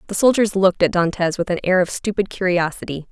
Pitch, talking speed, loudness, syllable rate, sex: 185 Hz, 210 wpm, -19 LUFS, 6.3 syllables/s, female